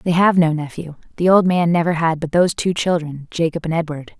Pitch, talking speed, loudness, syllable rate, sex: 165 Hz, 230 wpm, -18 LUFS, 5.8 syllables/s, female